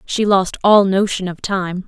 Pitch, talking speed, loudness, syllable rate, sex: 190 Hz, 190 wpm, -16 LUFS, 4.1 syllables/s, female